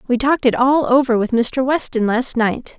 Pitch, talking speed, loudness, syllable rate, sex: 250 Hz, 215 wpm, -17 LUFS, 4.9 syllables/s, female